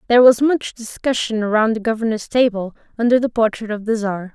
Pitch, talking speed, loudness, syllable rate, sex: 225 Hz, 195 wpm, -18 LUFS, 5.8 syllables/s, female